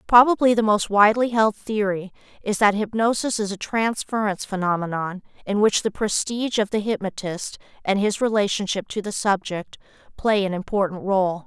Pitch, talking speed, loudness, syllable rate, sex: 205 Hz, 155 wpm, -22 LUFS, 5.2 syllables/s, female